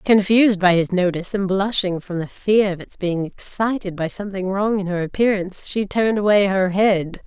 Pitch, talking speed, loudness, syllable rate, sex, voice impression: 195 Hz, 200 wpm, -19 LUFS, 5.4 syllables/s, female, feminine, middle-aged, tensed, bright, slightly clear, intellectual, calm, friendly, lively, slightly sharp